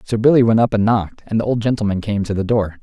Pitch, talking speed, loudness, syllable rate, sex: 110 Hz, 300 wpm, -17 LUFS, 6.8 syllables/s, male